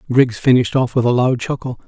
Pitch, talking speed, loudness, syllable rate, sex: 125 Hz, 225 wpm, -16 LUFS, 6.3 syllables/s, male